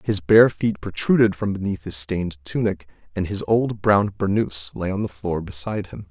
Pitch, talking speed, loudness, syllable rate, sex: 95 Hz, 195 wpm, -21 LUFS, 5.0 syllables/s, male